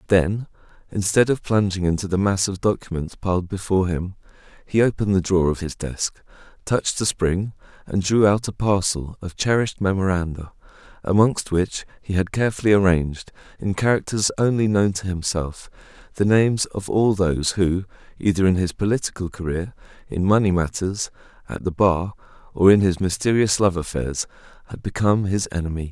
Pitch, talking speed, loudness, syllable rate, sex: 95 Hz, 160 wpm, -21 LUFS, 5.5 syllables/s, male